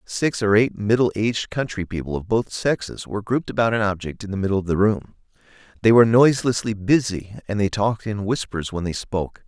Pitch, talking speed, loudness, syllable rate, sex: 105 Hz, 210 wpm, -21 LUFS, 6.0 syllables/s, male